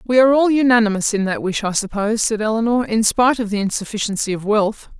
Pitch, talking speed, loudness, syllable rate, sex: 220 Hz, 215 wpm, -17 LUFS, 6.5 syllables/s, female